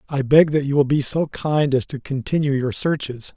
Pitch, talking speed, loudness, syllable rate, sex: 140 Hz, 230 wpm, -20 LUFS, 5.1 syllables/s, male